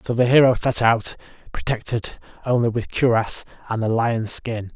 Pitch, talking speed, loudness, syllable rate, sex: 115 Hz, 165 wpm, -21 LUFS, 4.8 syllables/s, male